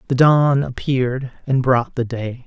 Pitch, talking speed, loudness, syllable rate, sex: 130 Hz, 170 wpm, -18 LUFS, 4.0 syllables/s, male